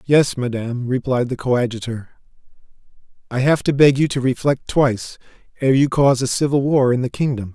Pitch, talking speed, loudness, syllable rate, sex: 130 Hz, 175 wpm, -18 LUFS, 5.6 syllables/s, male